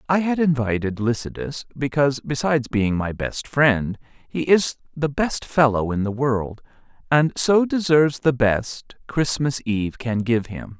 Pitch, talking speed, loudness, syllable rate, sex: 130 Hz, 155 wpm, -21 LUFS, 4.4 syllables/s, male